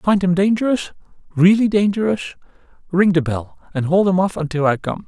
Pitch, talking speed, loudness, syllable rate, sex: 180 Hz, 180 wpm, -18 LUFS, 6.3 syllables/s, male